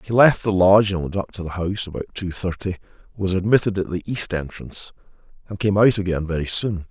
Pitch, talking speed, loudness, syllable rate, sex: 95 Hz, 215 wpm, -21 LUFS, 6.2 syllables/s, male